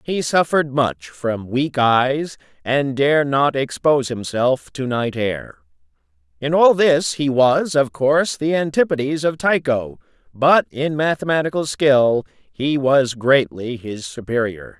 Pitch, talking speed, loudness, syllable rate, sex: 135 Hz, 140 wpm, -18 LUFS, 3.9 syllables/s, male